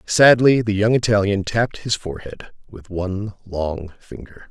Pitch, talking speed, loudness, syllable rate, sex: 100 Hz, 145 wpm, -19 LUFS, 4.7 syllables/s, male